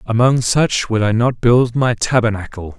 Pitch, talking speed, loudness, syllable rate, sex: 115 Hz, 170 wpm, -15 LUFS, 4.5 syllables/s, male